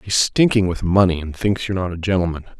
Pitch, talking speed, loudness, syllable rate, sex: 90 Hz, 230 wpm, -19 LUFS, 6.3 syllables/s, male